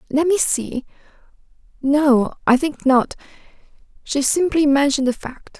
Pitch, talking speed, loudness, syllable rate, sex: 280 Hz, 95 wpm, -18 LUFS, 4.5 syllables/s, female